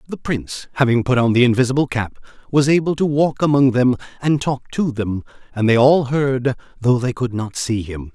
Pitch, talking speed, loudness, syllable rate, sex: 130 Hz, 205 wpm, -18 LUFS, 5.2 syllables/s, male